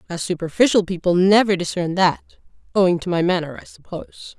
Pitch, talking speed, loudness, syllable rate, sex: 180 Hz, 165 wpm, -19 LUFS, 5.8 syllables/s, female